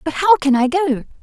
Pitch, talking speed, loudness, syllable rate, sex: 305 Hz, 245 wpm, -16 LUFS, 5.2 syllables/s, female